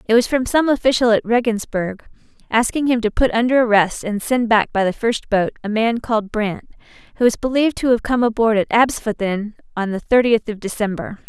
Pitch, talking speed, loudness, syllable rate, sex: 225 Hz, 200 wpm, -18 LUFS, 5.5 syllables/s, female